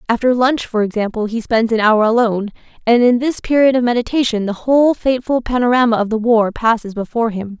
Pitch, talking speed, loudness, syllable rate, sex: 235 Hz, 195 wpm, -15 LUFS, 6.1 syllables/s, female